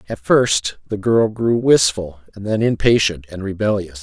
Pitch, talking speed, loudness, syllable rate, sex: 110 Hz, 165 wpm, -17 LUFS, 4.5 syllables/s, male